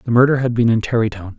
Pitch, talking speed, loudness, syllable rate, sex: 115 Hz, 260 wpm, -17 LUFS, 7.2 syllables/s, male